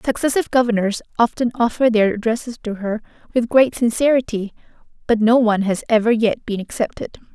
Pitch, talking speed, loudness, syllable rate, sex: 230 Hz, 155 wpm, -18 LUFS, 5.9 syllables/s, female